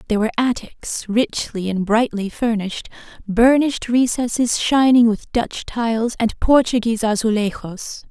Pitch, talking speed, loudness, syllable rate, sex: 230 Hz, 120 wpm, -18 LUFS, 4.8 syllables/s, female